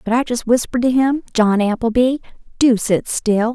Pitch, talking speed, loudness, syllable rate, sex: 235 Hz, 185 wpm, -17 LUFS, 5.0 syllables/s, female